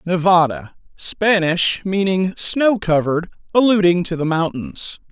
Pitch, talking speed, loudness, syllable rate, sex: 180 Hz, 95 wpm, -17 LUFS, 4.0 syllables/s, male